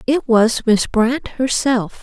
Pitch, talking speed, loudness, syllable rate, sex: 240 Hz, 150 wpm, -16 LUFS, 3.2 syllables/s, female